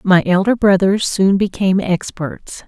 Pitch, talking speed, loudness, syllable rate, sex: 190 Hz, 135 wpm, -15 LUFS, 4.3 syllables/s, female